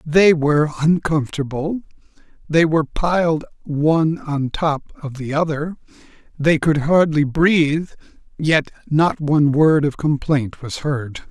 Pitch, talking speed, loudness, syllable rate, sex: 155 Hz, 125 wpm, -18 LUFS, 4.2 syllables/s, male